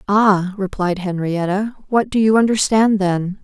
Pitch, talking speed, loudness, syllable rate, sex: 200 Hz, 140 wpm, -17 LUFS, 4.2 syllables/s, female